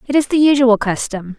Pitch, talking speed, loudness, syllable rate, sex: 245 Hz, 215 wpm, -15 LUFS, 5.6 syllables/s, female